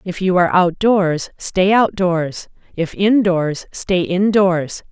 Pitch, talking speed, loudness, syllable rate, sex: 180 Hz, 120 wpm, -16 LUFS, 3.4 syllables/s, female